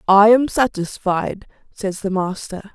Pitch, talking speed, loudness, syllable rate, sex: 205 Hz, 130 wpm, -18 LUFS, 3.9 syllables/s, female